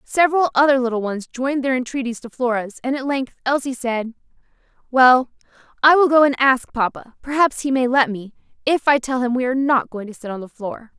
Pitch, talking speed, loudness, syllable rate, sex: 255 Hz, 215 wpm, -19 LUFS, 5.7 syllables/s, female